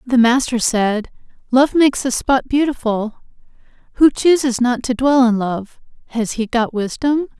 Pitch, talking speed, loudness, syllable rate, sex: 250 Hz, 155 wpm, -17 LUFS, 4.5 syllables/s, female